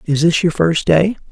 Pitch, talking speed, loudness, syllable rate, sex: 170 Hz, 230 wpm, -15 LUFS, 4.6 syllables/s, male